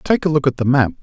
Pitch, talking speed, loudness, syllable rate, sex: 135 Hz, 350 wpm, -17 LUFS, 6.6 syllables/s, male